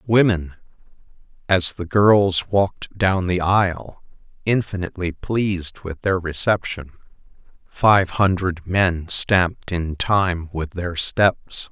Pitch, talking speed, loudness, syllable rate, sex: 90 Hz, 115 wpm, -20 LUFS, 3.6 syllables/s, male